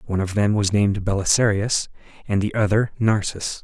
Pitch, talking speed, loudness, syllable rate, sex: 105 Hz, 165 wpm, -21 LUFS, 5.4 syllables/s, male